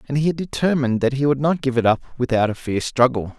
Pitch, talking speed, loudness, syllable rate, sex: 130 Hz, 265 wpm, -20 LUFS, 6.9 syllables/s, male